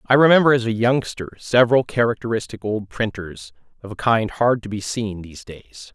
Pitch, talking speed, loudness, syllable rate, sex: 110 Hz, 180 wpm, -19 LUFS, 5.2 syllables/s, male